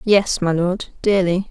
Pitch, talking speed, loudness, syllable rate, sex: 185 Hz, 160 wpm, -19 LUFS, 3.8 syllables/s, female